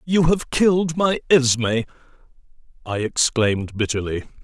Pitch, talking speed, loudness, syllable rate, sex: 135 Hz, 110 wpm, -20 LUFS, 4.8 syllables/s, male